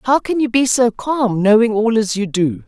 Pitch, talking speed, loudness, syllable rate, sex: 230 Hz, 245 wpm, -16 LUFS, 4.6 syllables/s, female